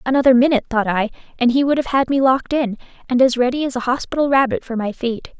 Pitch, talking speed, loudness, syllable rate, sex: 255 Hz, 245 wpm, -18 LUFS, 6.8 syllables/s, female